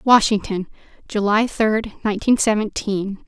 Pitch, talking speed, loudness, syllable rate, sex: 210 Hz, 90 wpm, -20 LUFS, 4.6 syllables/s, female